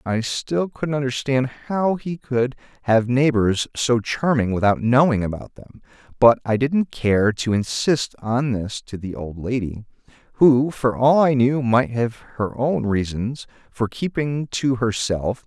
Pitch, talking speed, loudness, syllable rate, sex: 125 Hz, 160 wpm, -21 LUFS, 3.9 syllables/s, male